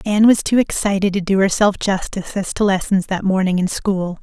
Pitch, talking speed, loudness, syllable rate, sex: 195 Hz, 215 wpm, -17 LUFS, 5.6 syllables/s, female